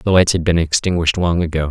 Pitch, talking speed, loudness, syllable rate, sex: 85 Hz, 245 wpm, -16 LUFS, 6.6 syllables/s, male